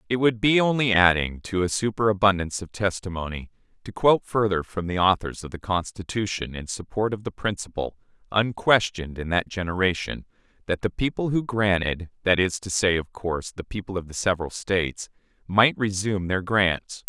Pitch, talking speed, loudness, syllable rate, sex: 95 Hz, 165 wpm, -24 LUFS, 5.4 syllables/s, male